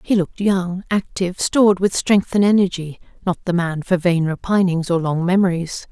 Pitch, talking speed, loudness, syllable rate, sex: 180 Hz, 185 wpm, -18 LUFS, 5.2 syllables/s, female